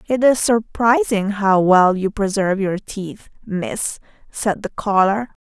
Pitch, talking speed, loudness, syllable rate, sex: 205 Hz, 145 wpm, -18 LUFS, 3.8 syllables/s, female